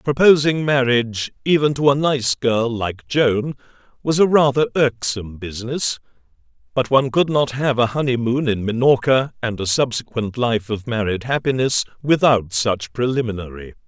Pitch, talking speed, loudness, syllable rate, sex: 125 Hz, 145 wpm, -19 LUFS, 4.9 syllables/s, male